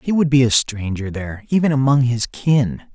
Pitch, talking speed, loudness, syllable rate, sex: 125 Hz, 205 wpm, -18 LUFS, 5.1 syllables/s, male